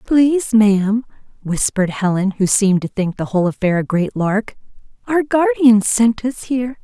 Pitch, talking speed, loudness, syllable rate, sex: 220 Hz, 165 wpm, -16 LUFS, 5.0 syllables/s, female